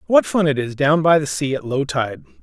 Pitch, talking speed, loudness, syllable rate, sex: 140 Hz, 270 wpm, -19 LUFS, 5.2 syllables/s, male